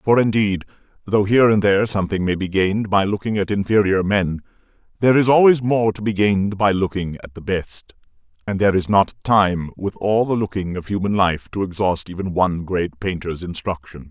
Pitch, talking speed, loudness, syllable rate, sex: 100 Hz, 195 wpm, -19 LUFS, 5.5 syllables/s, male